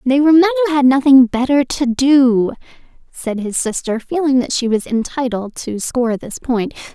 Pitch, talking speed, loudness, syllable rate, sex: 260 Hz, 180 wpm, -15 LUFS, 5.1 syllables/s, female